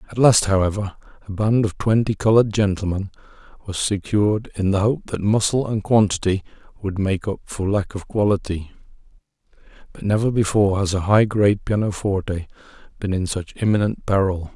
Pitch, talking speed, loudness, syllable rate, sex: 100 Hz, 155 wpm, -20 LUFS, 5.5 syllables/s, male